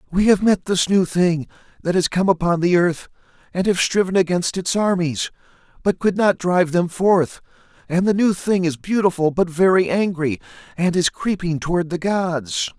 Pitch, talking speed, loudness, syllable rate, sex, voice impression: 175 Hz, 185 wpm, -19 LUFS, 4.9 syllables/s, male, masculine, adult-like, thick, tensed, powerful, slightly hard, clear, intellectual, slightly mature, reassuring, slightly unique, wild, lively, strict